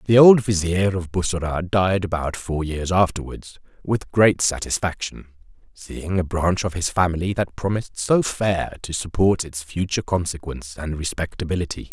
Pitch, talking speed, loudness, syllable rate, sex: 90 Hz, 150 wpm, -21 LUFS, 5.0 syllables/s, male